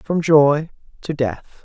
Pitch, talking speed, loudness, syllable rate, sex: 150 Hz, 145 wpm, -17 LUFS, 3.3 syllables/s, female